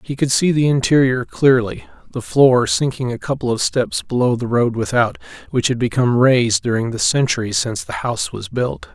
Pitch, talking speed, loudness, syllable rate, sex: 125 Hz, 190 wpm, -17 LUFS, 5.4 syllables/s, male